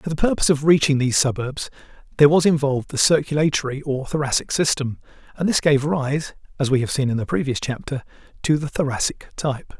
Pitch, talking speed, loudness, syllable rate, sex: 145 Hz, 190 wpm, -20 LUFS, 6.2 syllables/s, male